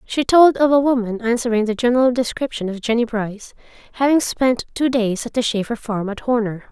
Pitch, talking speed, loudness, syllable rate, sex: 235 Hz, 195 wpm, -18 LUFS, 5.6 syllables/s, female